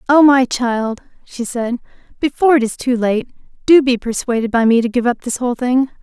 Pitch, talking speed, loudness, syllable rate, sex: 245 Hz, 210 wpm, -16 LUFS, 5.4 syllables/s, female